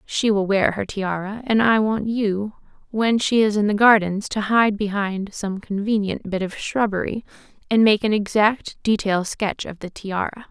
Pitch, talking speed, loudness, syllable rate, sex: 210 Hz, 185 wpm, -21 LUFS, 4.4 syllables/s, female